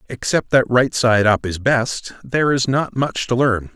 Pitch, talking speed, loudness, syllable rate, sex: 120 Hz, 210 wpm, -18 LUFS, 4.3 syllables/s, male